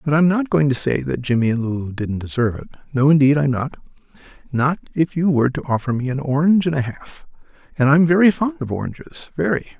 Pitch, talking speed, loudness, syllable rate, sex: 140 Hz, 220 wpm, -19 LUFS, 6.2 syllables/s, male